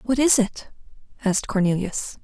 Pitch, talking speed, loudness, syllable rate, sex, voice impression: 215 Hz, 135 wpm, -22 LUFS, 4.9 syllables/s, female, very feminine, slightly young, slightly adult-like, very thin, slightly tensed, weak, bright, hard, clear, fluent, cute, slightly cool, very intellectual, refreshing, very sincere, very calm, friendly, very reassuring, slightly unique, elegant, very sweet, slightly lively, slightly kind